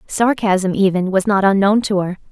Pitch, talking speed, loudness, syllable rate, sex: 200 Hz, 180 wpm, -16 LUFS, 4.8 syllables/s, female